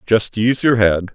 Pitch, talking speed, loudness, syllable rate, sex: 110 Hz, 210 wpm, -16 LUFS, 5.0 syllables/s, male